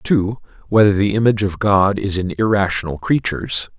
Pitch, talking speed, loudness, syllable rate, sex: 100 Hz, 160 wpm, -17 LUFS, 5.9 syllables/s, male